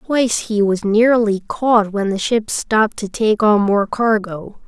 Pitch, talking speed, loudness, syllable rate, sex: 215 Hz, 180 wpm, -16 LUFS, 4.0 syllables/s, female